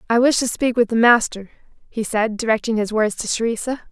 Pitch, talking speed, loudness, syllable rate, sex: 230 Hz, 200 wpm, -19 LUFS, 5.7 syllables/s, female